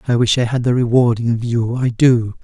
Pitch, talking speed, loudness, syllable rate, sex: 120 Hz, 220 wpm, -16 LUFS, 5.4 syllables/s, male